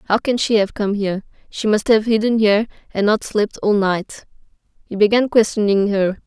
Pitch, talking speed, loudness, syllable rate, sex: 210 Hz, 190 wpm, -18 LUFS, 5.2 syllables/s, female